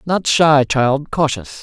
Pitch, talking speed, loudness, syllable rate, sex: 145 Hz, 150 wpm, -15 LUFS, 3.3 syllables/s, male